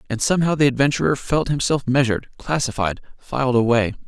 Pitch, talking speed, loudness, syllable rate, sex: 130 Hz, 145 wpm, -20 LUFS, 6.2 syllables/s, male